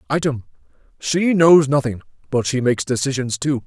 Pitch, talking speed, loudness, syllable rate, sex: 135 Hz, 130 wpm, -18 LUFS, 5.3 syllables/s, male